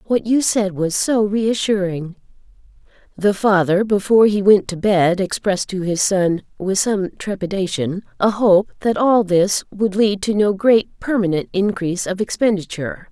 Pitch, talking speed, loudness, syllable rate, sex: 195 Hz, 155 wpm, -18 LUFS, 4.7 syllables/s, female